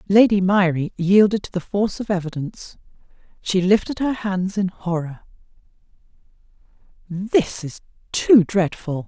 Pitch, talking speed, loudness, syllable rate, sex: 190 Hz, 120 wpm, -20 LUFS, 4.6 syllables/s, female